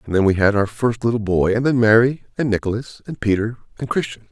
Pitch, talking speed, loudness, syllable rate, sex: 110 Hz, 235 wpm, -19 LUFS, 6.0 syllables/s, male